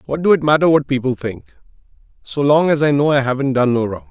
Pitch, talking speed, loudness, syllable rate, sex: 140 Hz, 250 wpm, -16 LUFS, 6.1 syllables/s, male